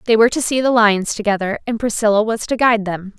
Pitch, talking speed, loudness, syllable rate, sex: 220 Hz, 245 wpm, -16 LUFS, 6.5 syllables/s, female